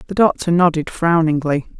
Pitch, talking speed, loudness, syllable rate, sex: 165 Hz, 135 wpm, -17 LUFS, 5.3 syllables/s, female